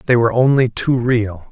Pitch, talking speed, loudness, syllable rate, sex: 120 Hz, 200 wpm, -15 LUFS, 5.3 syllables/s, male